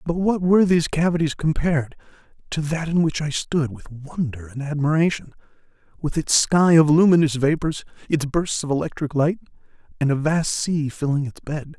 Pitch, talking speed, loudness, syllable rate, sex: 155 Hz, 175 wpm, -21 LUFS, 5.2 syllables/s, male